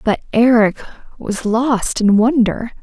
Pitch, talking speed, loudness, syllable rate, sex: 230 Hz, 130 wpm, -15 LUFS, 3.8 syllables/s, female